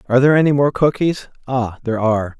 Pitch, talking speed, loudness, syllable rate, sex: 130 Hz, 200 wpm, -17 LUFS, 7.1 syllables/s, male